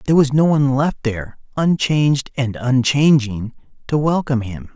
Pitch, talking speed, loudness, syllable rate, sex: 135 Hz, 150 wpm, -17 LUFS, 5.3 syllables/s, male